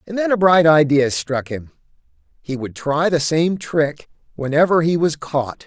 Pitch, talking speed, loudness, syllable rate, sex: 155 Hz, 180 wpm, -17 LUFS, 4.4 syllables/s, male